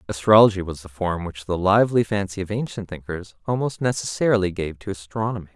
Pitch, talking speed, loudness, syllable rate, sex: 100 Hz, 175 wpm, -22 LUFS, 6.1 syllables/s, male